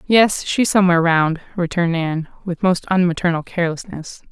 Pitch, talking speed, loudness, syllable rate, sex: 175 Hz, 140 wpm, -18 LUFS, 5.5 syllables/s, female